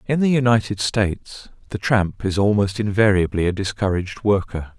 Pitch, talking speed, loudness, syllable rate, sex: 100 Hz, 150 wpm, -20 LUFS, 5.2 syllables/s, male